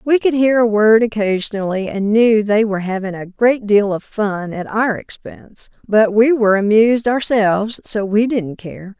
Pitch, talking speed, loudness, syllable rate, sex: 215 Hz, 185 wpm, -15 LUFS, 4.7 syllables/s, female